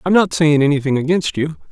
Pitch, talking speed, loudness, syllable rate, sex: 155 Hz, 210 wpm, -16 LUFS, 6.0 syllables/s, male